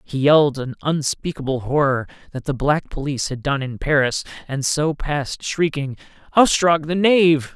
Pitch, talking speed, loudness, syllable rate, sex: 145 Hz, 160 wpm, -20 LUFS, 4.9 syllables/s, male